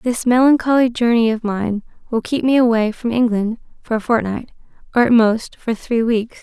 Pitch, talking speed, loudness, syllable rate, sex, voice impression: 230 Hz, 185 wpm, -17 LUFS, 4.9 syllables/s, female, feminine, slightly adult-like, slightly tensed, slightly soft, slightly cute, slightly refreshing, friendly, kind